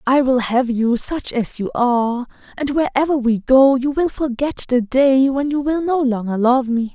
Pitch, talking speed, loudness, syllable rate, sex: 260 Hz, 205 wpm, -17 LUFS, 4.5 syllables/s, female